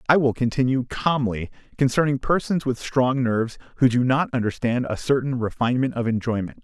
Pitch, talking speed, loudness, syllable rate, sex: 125 Hz, 165 wpm, -22 LUFS, 5.6 syllables/s, male